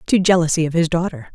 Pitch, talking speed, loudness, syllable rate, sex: 165 Hz, 225 wpm, -18 LUFS, 6.7 syllables/s, female